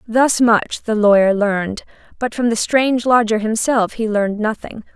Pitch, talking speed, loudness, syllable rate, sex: 225 Hz, 170 wpm, -16 LUFS, 4.8 syllables/s, female